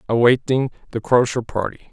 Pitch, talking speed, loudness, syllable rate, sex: 120 Hz, 125 wpm, -19 LUFS, 5.6 syllables/s, male